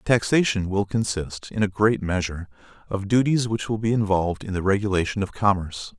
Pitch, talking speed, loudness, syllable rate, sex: 100 Hz, 180 wpm, -23 LUFS, 5.7 syllables/s, male